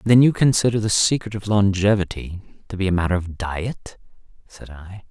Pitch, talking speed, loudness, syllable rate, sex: 100 Hz, 175 wpm, -20 LUFS, 5.0 syllables/s, male